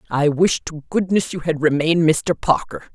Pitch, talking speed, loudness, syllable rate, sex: 160 Hz, 185 wpm, -19 LUFS, 5.1 syllables/s, female